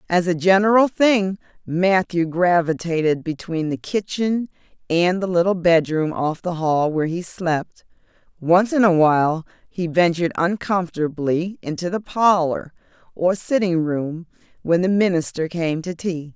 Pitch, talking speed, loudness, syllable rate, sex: 175 Hz, 140 wpm, -20 LUFS, 4.4 syllables/s, female